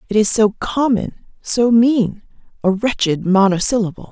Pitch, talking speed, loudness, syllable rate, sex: 215 Hz, 115 wpm, -16 LUFS, 4.7 syllables/s, female